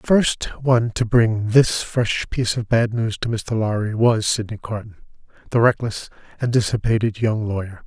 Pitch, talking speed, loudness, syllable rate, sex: 115 Hz, 175 wpm, -20 LUFS, 4.8 syllables/s, male